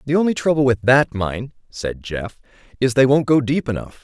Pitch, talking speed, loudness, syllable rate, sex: 125 Hz, 210 wpm, -18 LUFS, 5.3 syllables/s, male